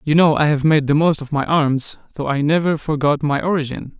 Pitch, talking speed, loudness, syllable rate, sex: 150 Hz, 240 wpm, -18 LUFS, 5.4 syllables/s, male